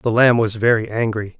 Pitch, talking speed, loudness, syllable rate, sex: 110 Hz, 215 wpm, -17 LUFS, 5.2 syllables/s, male